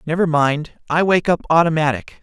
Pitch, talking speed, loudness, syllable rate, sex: 160 Hz, 160 wpm, -17 LUFS, 5.1 syllables/s, male